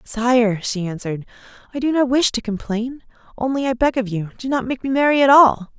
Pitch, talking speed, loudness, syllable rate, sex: 245 Hz, 220 wpm, -18 LUFS, 5.5 syllables/s, female